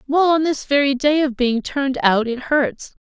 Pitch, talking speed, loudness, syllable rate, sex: 275 Hz, 220 wpm, -18 LUFS, 4.7 syllables/s, female